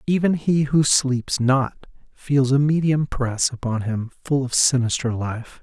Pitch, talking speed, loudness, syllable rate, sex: 135 Hz, 160 wpm, -20 LUFS, 3.9 syllables/s, male